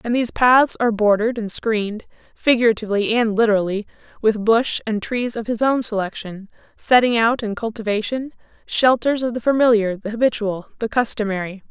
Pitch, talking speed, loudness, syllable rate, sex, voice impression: 225 Hz, 150 wpm, -19 LUFS, 5.6 syllables/s, female, very feminine, slightly young, slightly adult-like, very thin, tensed, slightly powerful, bright, hard, very clear, slightly halting, slightly cute, intellectual, slightly refreshing, very sincere, slightly calm, friendly, reassuring, slightly unique, elegant, sweet, slightly lively, very kind, slightly modest